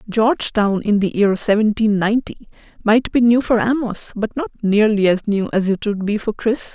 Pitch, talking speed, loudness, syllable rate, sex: 215 Hz, 195 wpm, -17 LUFS, 5.1 syllables/s, female